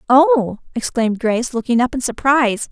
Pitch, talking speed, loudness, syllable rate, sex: 250 Hz, 155 wpm, -17 LUFS, 5.5 syllables/s, female